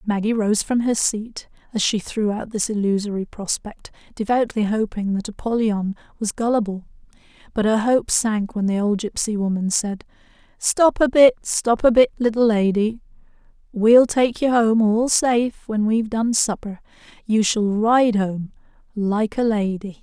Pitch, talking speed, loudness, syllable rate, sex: 220 Hz, 160 wpm, -20 LUFS, 4.5 syllables/s, female